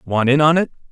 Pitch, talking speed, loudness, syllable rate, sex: 140 Hz, 260 wpm, -15 LUFS, 5.9 syllables/s, male